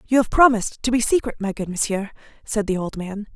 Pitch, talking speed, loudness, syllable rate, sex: 215 Hz, 235 wpm, -21 LUFS, 6.1 syllables/s, female